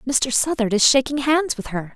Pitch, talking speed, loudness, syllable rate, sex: 255 Hz, 215 wpm, -19 LUFS, 5.0 syllables/s, female